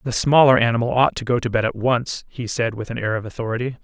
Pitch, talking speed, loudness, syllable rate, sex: 120 Hz, 265 wpm, -20 LUFS, 6.3 syllables/s, male